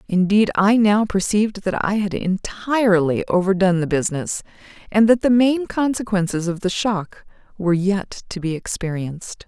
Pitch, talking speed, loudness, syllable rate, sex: 195 Hz, 150 wpm, -19 LUFS, 5.0 syllables/s, female